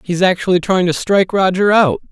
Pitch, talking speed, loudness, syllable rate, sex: 180 Hz, 200 wpm, -14 LUFS, 5.7 syllables/s, male